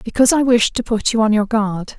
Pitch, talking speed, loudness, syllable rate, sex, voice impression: 225 Hz, 270 wpm, -16 LUFS, 5.8 syllables/s, female, very feminine, adult-like, calm, slightly elegant, slightly sweet